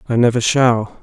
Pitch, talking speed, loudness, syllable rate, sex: 120 Hz, 175 wpm, -15 LUFS, 4.8 syllables/s, male